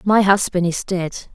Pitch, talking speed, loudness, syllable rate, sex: 185 Hz, 180 wpm, -18 LUFS, 4.2 syllables/s, female